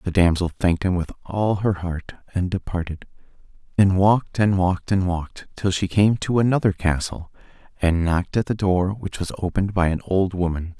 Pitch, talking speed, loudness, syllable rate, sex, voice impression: 95 Hz, 190 wpm, -22 LUFS, 5.3 syllables/s, male, masculine, adult-like, slightly weak, slightly dark, slightly soft, fluent, cool, calm, slightly friendly, wild, kind, modest